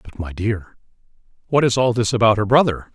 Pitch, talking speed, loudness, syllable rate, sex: 115 Hz, 205 wpm, -18 LUFS, 5.7 syllables/s, male